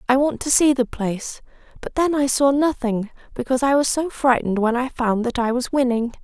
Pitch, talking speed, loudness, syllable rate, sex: 255 Hz, 220 wpm, -20 LUFS, 5.6 syllables/s, female